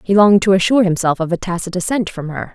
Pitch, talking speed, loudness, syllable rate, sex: 185 Hz, 260 wpm, -16 LUFS, 6.9 syllables/s, female